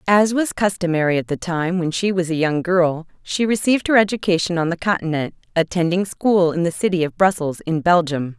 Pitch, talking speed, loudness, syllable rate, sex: 175 Hz, 200 wpm, -19 LUFS, 5.5 syllables/s, female